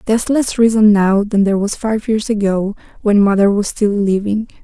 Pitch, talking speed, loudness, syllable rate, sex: 210 Hz, 195 wpm, -15 LUFS, 5.2 syllables/s, female